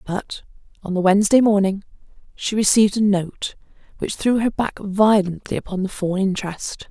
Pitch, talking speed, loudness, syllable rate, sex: 200 Hz, 155 wpm, -20 LUFS, 5.1 syllables/s, female